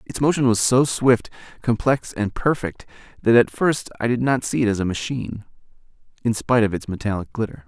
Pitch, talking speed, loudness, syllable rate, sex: 115 Hz, 195 wpm, -21 LUFS, 5.7 syllables/s, male